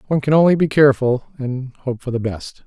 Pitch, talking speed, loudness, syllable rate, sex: 135 Hz, 225 wpm, -18 LUFS, 6.4 syllables/s, male